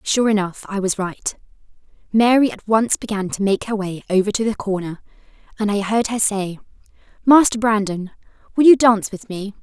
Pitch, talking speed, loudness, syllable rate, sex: 210 Hz, 180 wpm, -18 LUFS, 5.3 syllables/s, female